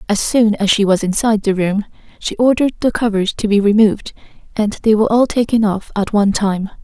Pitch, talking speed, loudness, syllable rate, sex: 210 Hz, 210 wpm, -15 LUFS, 5.9 syllables/s, female